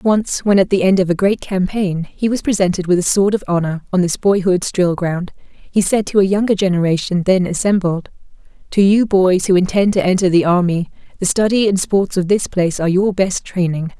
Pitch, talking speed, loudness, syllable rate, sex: 185 Hz, 215 wpm, -16 LUFS, 5.4 syllables/s, female